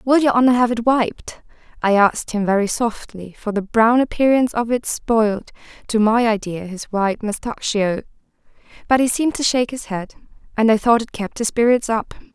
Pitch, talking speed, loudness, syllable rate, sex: 225 Hz, 190 wpm, -18 LUFS, 5.2 syllables/s, female